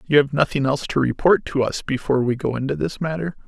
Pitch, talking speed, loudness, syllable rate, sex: 140 Hz, 240 wpm, -21 LUFS, 6.4 syllables/s, male